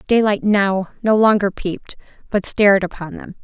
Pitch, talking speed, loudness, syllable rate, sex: 200 Hz, 155 wpm, -17 LUFS, 5.1 syllables/s, female